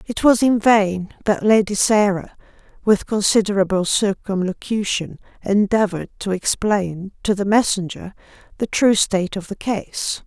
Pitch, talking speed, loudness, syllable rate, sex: 200 Hz, 130 wpm, -19 LUFS, 4.5 syllables/s, female